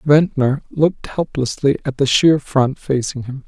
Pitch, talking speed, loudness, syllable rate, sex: 135 Hz, 155 wpm, -17 LUFS, 4.3 syllables/s, male